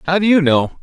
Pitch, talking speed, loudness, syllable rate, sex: 165 Hz, 290 wpm, -14 LUFS, 6.0 syllables/s, male